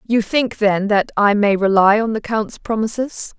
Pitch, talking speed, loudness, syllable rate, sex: 215 Hz, 195 wpm, -17 LUFS, 4.1 syllables/s, female